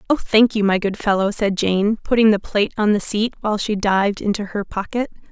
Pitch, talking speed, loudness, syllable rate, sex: 210 Hz, 225 wpm, -19 LUFS, 5.6 syllables/s, female